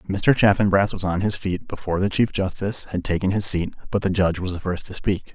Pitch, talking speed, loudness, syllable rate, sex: 95 Hz, 245 wpm, -22 LUFS, 6.0 syllables/s, male